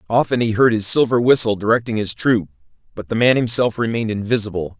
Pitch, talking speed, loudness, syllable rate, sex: 110 Hz, 190 wpm, -17 LUFS, 6.3 syllables/s, male